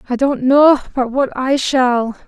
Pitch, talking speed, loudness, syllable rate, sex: 260 Hz, 185 wpm, -15 LUFS, 3.8 syllables/s, female